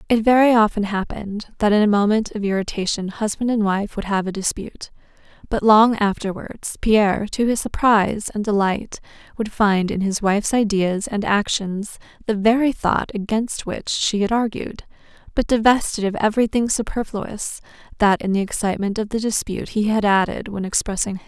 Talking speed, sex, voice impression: 170 wpm, female, very feminine, adult-like, slightly middle-aged, thin, slightly tensed, slightly weak, slightly dark, soft, slightly muffled, very fluent, slightly raspy, slightly cute, slightly cool, intellectual, refreshing, sincere, slightly calm, friendly, reassuring, elegant, sweet, kind, slightly intense, slightly sharp, slightly modest